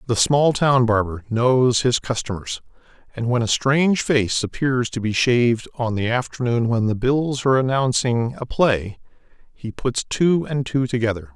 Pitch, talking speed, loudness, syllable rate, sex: 120 Hz, 170 wpm, -20 LUFS, 4.6 syllables/s, male